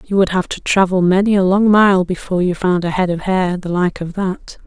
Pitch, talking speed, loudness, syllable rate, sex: 185 Hz, 255 wpm, -16 LUFS, 5.3 syllables/s, female